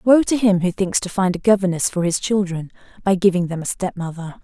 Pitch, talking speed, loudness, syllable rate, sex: 185 Hz, 230 wpm, -19 LUFS, 5.8 syllables/s, female